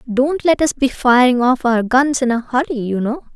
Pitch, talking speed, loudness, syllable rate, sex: 250 Hz, 235 wpm, -16 LUFS, 4.9 syllables/s, female